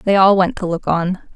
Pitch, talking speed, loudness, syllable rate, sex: 190 Hz, 265 wpm, -16 LUFS, 4.9 syllables/s, female